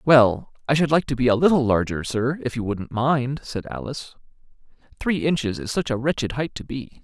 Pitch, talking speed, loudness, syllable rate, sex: 130 Hz, 215 wpm, -22 LUFS, 5.3 syllables/s, male